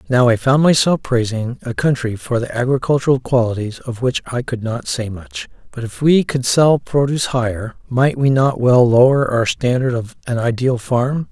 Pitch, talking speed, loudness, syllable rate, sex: 125 Hz, 190 wpm, -16 LUFS, 4.8 syllables/s, male